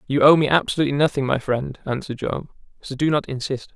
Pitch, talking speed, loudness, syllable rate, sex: 140 Hz, 210 wpm, -21 LUFS, 6.6 syllables/s, male